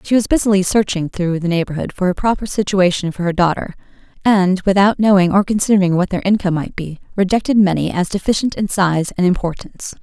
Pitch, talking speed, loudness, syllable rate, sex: 190 Hz, 190 wpm, -16 LUFS, 6.1 syllables/s, female